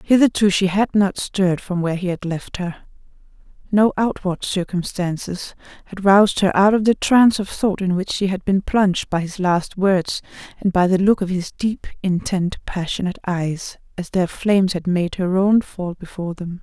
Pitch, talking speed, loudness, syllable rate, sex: 190 Hz, 190 wpm, -19 LUFS, 4.9 syllables/s, female